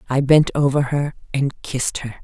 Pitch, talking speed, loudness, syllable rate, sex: 135 Hz, 190 wpm, -19 LUFS, 5.1 syllables/s, female